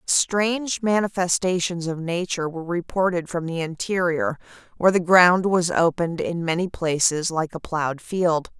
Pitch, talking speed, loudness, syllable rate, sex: 175 Hz, 145 wpm, -22 LUFS, 4.9 syllables/s, female